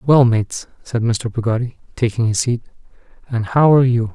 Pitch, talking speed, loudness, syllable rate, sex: 120 Hz, 175 wpm, -17 LUFS, 5.4 syllables/s, male